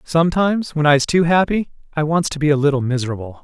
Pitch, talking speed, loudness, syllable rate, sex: 155 Hz, 210 wpm, -17 LUFS, 6.4 syllables/s, male